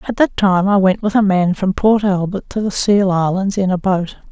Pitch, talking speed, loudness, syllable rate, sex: 195 Hz, 250 wpm, -15 LUFS, 5.0 syllables/s, female